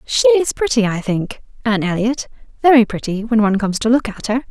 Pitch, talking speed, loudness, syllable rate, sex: 230 Hz, 215 wpm, -17 LUFS, 6.3 syllables/s, female